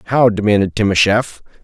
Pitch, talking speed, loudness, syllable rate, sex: 105 Hz, 110 wpm, -14 LUFS, 5.8 syllables/s, male